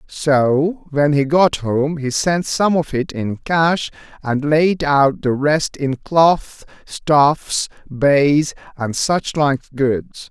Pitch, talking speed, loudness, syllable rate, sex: 145 Hz, 145 wpm, -17 LUFS, 2.9 syllables/s, male